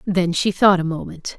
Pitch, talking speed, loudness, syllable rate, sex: 180 Hz, 215 wpm, -18 LUFS, 4.8 syllables/s, female